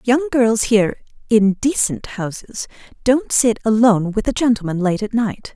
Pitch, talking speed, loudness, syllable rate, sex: 225 Hz, 140 wpm, -17 LUFS, 4.8 syllables/s, female